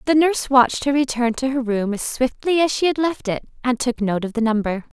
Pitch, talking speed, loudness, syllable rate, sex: 255 Hz, 255 wpm, -20 LUFS, 5.8 syllables/s, female